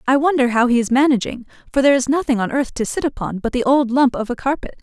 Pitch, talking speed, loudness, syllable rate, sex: 255 Hz, 275 wpm, -18 LUFS, 6.6 syllables/s, female